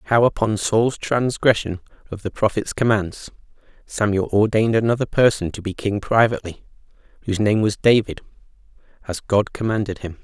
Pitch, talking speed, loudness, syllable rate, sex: 105 Hz, 140 wpm, -20 LUFS, 5.4 syllables/s, male